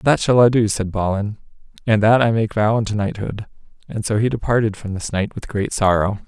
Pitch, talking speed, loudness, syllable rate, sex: 105 Hz, 220 wpm, -19 LUFS, 5.5 syllables/s, male